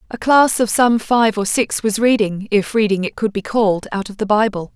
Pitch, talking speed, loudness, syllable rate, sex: 215 Hz, 240 wpm, -16 LUFS, 5.1 syllables/s, female